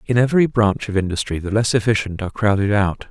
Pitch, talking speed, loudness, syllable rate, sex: 105 Hz, 215 wpm, -19 LUFS, 6.4 syllables/s, male